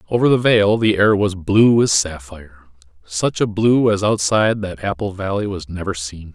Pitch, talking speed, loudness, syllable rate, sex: 95 Hz, 180 wpm, -17 LUFS, 4.9 syllables/s, male